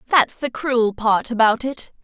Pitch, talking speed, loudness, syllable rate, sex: 240 Hz, 175 wpm, -19 LUFS, 4.1 syllables/s, female